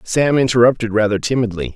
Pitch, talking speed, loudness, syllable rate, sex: 115 Hz, 135 wpm, -16 LUFS, 6.1 syllables/s, male